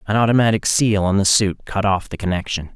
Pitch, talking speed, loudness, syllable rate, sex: 100 Hz, 220 wpm, -18 LUFS, 5.8 syllables/s, male